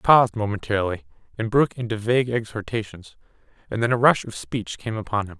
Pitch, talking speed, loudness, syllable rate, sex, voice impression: 110 Hz, 190 wpm, -23 LUFS, 6.6 syllables/s, male, masculine, adult-like, slightly thick, fluent, sincere, slightly kind